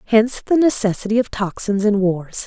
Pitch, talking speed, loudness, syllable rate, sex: 215 Hz, 170 wpm, -18 LUFS, 5.2 syllables/s, female